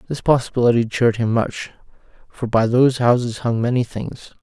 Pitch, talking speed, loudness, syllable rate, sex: 120 Hz, 165 wpm, -18 LUFS, 5.6 syllables/s, male